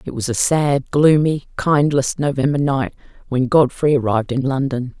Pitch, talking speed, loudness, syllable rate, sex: 135 Hz, 155 wpm, -17 LUFS, 4.8 syllables/s, female